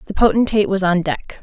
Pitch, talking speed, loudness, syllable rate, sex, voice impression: 200 Hz, 210 wpm, -17 LUFS, 6.5 syllables/s, female, very feminine, very adult-like, thin, tensed, slightly powerful, bright, soft, clear, fluent, slightly raspy, cute, intellectual, very refreshing, sincere, calm, very friendly, reassuring, unique, elegant, slightly wild, sweet, lively, kind, slightly modest, slightly light